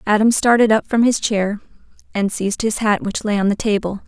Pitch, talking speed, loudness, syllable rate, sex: 210 Hz, 220 wpm, -17 LUFS, 5.6 syllables/s, female